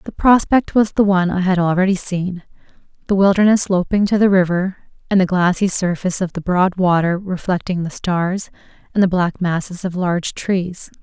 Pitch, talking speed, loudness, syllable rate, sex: 185 Hz, 175 wpm, -17 LUFS, 5.2 syllables/s, female